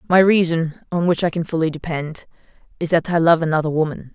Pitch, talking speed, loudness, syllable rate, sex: 165 Hz, 205 wpm, -19 LUFS, 5.9 syllables/s, female